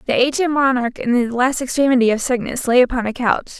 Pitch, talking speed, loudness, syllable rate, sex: 250 Hz, 215 wpm, -17 LUFS, 6.1 syllables/s, female